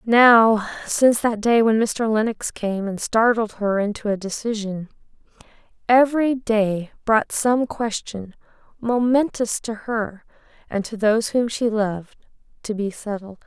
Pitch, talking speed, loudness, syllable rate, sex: 220 Hz, 140 wpm, -20 LUFS, 4.2 syllables/s, female